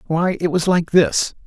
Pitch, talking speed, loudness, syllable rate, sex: 165 Hz, 205 wpm, -18 LUFS, 4.1 syllables/s, male